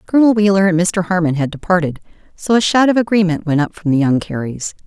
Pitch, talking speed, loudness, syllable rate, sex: 180 Hz, 220 wpm, -15 LUFS, 6.3 syllables/s, female